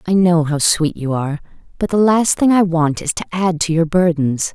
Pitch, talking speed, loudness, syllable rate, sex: 170 Hz, 240 wpm, -16 LUFS, 5.0 syllables/s, female